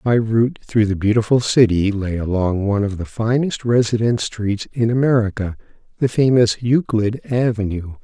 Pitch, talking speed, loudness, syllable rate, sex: 110 Hz, 140 wpm, -18 LUFS, 5.1 syllables/s, male